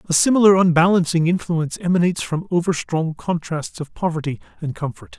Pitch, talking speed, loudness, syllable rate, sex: 170 Hz, 140 wpm, -19 LUFS, 5.8 syllables/s, male